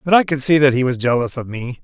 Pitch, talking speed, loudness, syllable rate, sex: 135 Hz, 325 wpm, -17 LUFS, 6.4 syllables/s, male